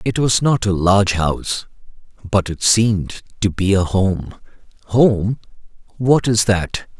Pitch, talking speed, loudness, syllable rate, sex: 100 Hz, 135 wpm, -17 LUFS, 4.0 syllables/s, male